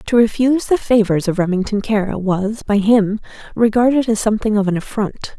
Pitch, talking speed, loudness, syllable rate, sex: 215 Hz, 180 wpm, -16 LUFS, 5.5 syllables/s, female